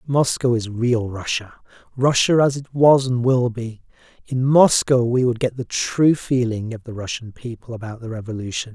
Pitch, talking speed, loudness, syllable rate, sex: 120 Hz, 180 wpm, -19 LUFS, 4.7 syllables/s, male